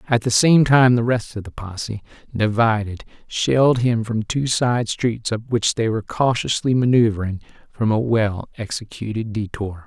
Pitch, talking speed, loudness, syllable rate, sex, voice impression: 115 Hz, 165 wpm, -20 LUFS, 4.5 syllables/s, male, very masculine, very adult-like, slightly old, very thick, relaxed, weak, dark, slightly hard, muffled, slightly fluent, cool, intellectual, very sincere, very calm, very mature, friendly, very reassuring, unique, elegant, slightly wild, slightly sweet, slightly lively, very kind, modest